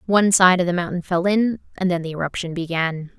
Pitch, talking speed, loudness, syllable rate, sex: 180 Hz, 225 wpm, -20 LUFS, 6.0 syllables/s, female